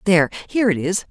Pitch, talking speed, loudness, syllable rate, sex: 185 Hz, 215 wpm, -19 LUFS, 8.0 syllables/s, female